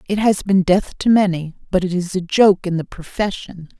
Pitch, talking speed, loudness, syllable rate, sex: 185 Hz, 220 wpm, -18 LUFS, 5.0 syllables/s, female